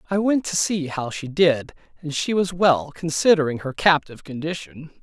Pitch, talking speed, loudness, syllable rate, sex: 160 Hz, 180 wpm, -21 LUFS, 5.0 syllables/s, male